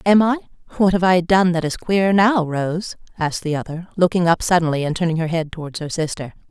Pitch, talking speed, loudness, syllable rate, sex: 175 Hz, 220 wpm, -19 LUFS, 5.7 syllables/s, female